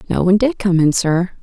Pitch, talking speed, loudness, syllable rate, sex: 185 Hz, 255 wpm, -15 LUFS, 5.8 syllables/s, female